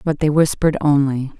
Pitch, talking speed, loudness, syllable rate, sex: 145 Hz, 170 wpm, -17 LUFS, 5.7 syllables/s, female